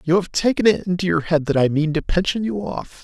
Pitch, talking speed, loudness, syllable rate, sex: 175 Hz, 275 wpm, -20 LUFS, 5.8 syllables/s, male